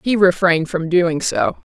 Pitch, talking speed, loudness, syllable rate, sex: 180 Hz, 175 wpm, -17 LUFS, 4.5 syllables/s, female